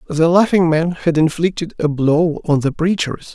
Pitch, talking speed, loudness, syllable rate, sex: 165 Hz, 180 wpm, -16 LUFS, 4.6 syllables/s, male